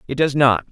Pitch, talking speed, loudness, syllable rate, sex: 135 Hz, 255 wpm, -17 LUFS, 6.0 syllables/s, male